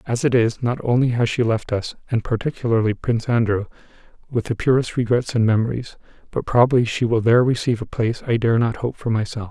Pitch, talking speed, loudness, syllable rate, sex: 115 Hz, 210 wpm, -20 LUFS, 6.2 syllables/s, male